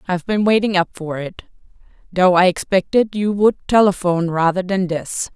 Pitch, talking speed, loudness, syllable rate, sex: 185 Hz, 155 wpm, -17 LUFS, 5.2 syllables/s, female